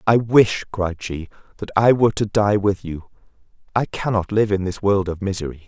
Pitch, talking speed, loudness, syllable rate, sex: 100 Hz, 200 wpm, -20 LUFS, 5.2 syllables/s, male